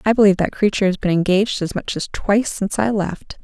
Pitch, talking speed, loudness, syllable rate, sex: 200 Hz, 245 wpm, -19 LUFS, 6.7 syllables/s, female